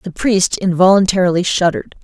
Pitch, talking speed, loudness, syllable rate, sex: 185 Hz, 120 wpm, -14 LUFS, 5.8 syllables/s, female